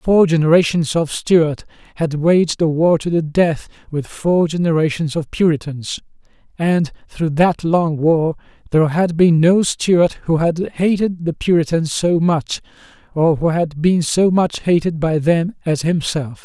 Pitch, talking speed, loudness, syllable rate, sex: 165 Hz, 160 wpm, -17 LUFS, 4.1 syllables/s, male